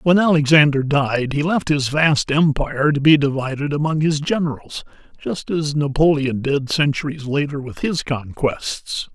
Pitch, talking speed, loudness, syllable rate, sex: 145 Hz, 150 wpm, -18 LUFS, 4.5 syllables/s, male